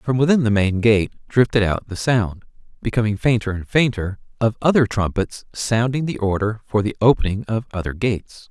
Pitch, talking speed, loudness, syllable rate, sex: 110 Hz, 175 wpm, -20 LUFS, 5.3 syllables/s, male